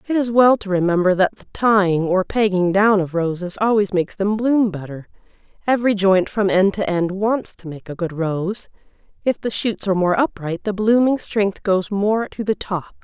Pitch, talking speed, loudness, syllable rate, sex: 200 Hz, 205 wpm, -19 LUFS, 4.9 syllables/s, female